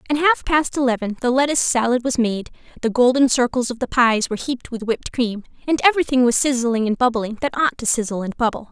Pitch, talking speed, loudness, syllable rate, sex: 250 Hz, 220 wpm, -19 LUFS, 6.3 syllables/s, female